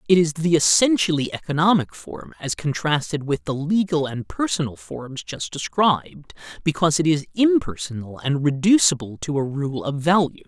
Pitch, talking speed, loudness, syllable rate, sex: 155 Hz, 155 wpm, -21 LUFS, 5.0 syllables/s, male